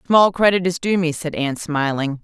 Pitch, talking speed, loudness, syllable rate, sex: 165 Hz, 215 wpm, -19 LUFS, 5.2 syllables/s, female